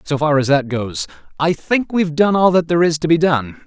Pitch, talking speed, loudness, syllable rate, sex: 155 Hz, 280 wpm, -16 LUFS, 5.6 syllables/s, male